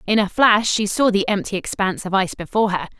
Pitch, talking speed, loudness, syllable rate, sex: 200 Hz, 240 wpm, -19 LUFS, 6.5 syllables/s, female